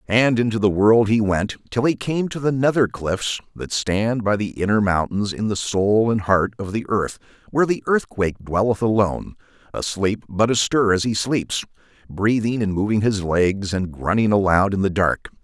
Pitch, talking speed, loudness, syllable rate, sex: 105 Hz, 190 wpm, -20 LUFS, 4.8 syllables/s, male